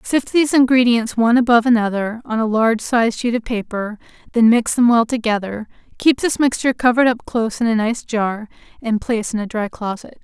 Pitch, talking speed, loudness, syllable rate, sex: 230 Hz, 200 wpm, -17 LUFS, 5.9 syllables/s, female